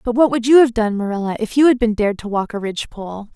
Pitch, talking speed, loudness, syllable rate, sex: 225 Hz, 285 wpm, -17 LUFS, 6.9 syllables/s, female